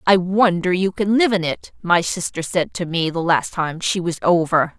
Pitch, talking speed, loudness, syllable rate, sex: 180 Hz, 225 wpm, -19 LUFS, 4.7 syllables/s, female